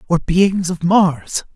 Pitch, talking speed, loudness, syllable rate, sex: 180 Hz, 155 wpm, -16 LUFS, 3.1 syllables/s, male